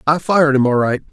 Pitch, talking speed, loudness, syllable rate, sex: 140 Hz, 270 wpm, -15 LUFS, 6.7 syllables/s, male